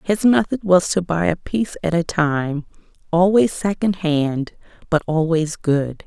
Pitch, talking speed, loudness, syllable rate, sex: 175 Hz, 150 wpm, -19 LUFS, 4.1 syllables/s, female